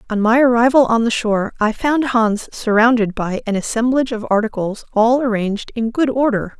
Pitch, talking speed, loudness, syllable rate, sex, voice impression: 230 Hz, 180 wpm, -17 LUFS, 5.4 syllables/s, female, feminine, adult-like, slightly sincere, friendly